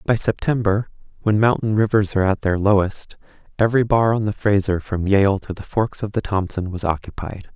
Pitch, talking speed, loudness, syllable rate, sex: 100 Hz, 190 wpm, -20 LUFS, 5.4 syllables/s, male